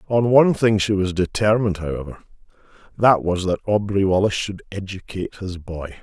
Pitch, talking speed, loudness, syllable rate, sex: 100 Hz, 160 wpm, -20 LUFS, 5.8 syllables/s, male